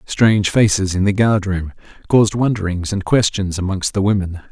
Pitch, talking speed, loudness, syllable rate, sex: 100 Hz, 175 wpm, -17 LUFS, 5.3 syllables/s, male